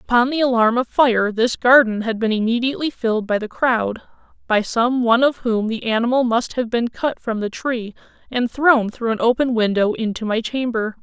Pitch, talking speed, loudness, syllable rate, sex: 235 Hz, 200 wpm, -19 LUFS, 5.1 syllables/s, female